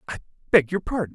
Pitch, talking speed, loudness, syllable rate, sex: 175 Hz, 210 wpm, -22 LUFS, 7.1 syllables/s, male